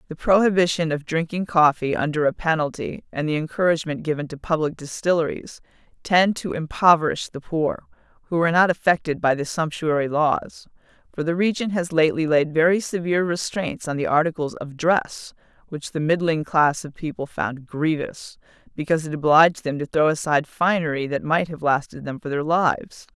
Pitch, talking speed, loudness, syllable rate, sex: 160 Hz, 170 wpm, -22 LUFS, 5.4 syllables/s, female